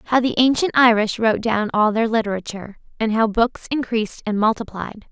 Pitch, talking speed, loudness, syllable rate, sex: 225 Hz, 175 wpm, -19 LUFS, 5.5 syllables/s, female